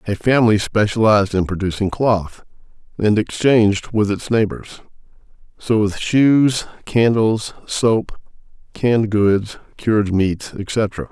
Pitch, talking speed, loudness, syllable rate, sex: 105 Hz, 115 wpm, -17 LUFS, 4.0 syllables/s, male